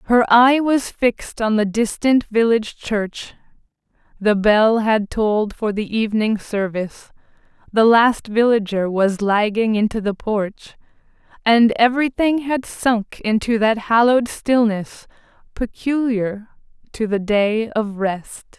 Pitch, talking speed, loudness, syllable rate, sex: 220 Hz, 125 wpm, -18 LUFS, 4.0 syllables/s, female